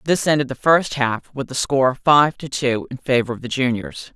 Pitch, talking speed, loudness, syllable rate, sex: 135 Hz, 230 wpm, -19 LUFS, 5.0 syllables/s, female